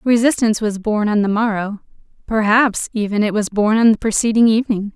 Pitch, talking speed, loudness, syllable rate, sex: 215 Hz, 180 wpm, -16 LUFS, 5.7 syllables/s, female